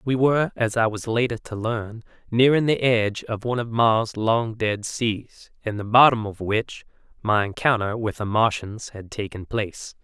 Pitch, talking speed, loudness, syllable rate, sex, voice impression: 115 Hz, 185 wpm, -22 LUFS, 4.7 syllables/s, male, masculine, adult-like, tensed, powerful, bright, soft, clear, intellectual, calm, friendly, wild, lively, slightly light